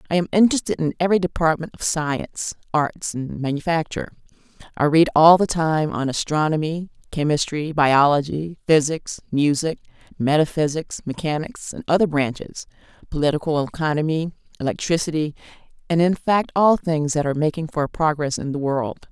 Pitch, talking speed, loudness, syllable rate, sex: 155 Hz, 130 wpm, -21 LUFS, 5.3 syllables/s, female